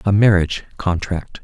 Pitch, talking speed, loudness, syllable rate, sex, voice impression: 95 Hz, 125 wpm, -18 LUFS, 5.1 syllables/s, male, masculine, adult-like, relaxed, weak, slightly dark, slightly muffled, cool, intellectual, sincere, calm, friendly, reassuring, wild, slightly lively, kind, slightly modest